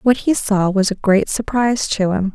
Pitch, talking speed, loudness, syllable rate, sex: 210 Hz, 230 wpm, -17 LUFS, 4.8 syllables/s, female